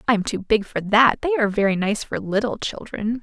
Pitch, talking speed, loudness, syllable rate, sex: 215 Hz, 240 wpm, -21 LUFS, 5.7 syllables/s, female